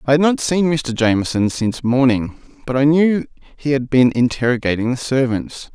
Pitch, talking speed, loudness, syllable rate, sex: 130 Hz, 180 wpm, -17 LUFS, 5.2 syllables/s, male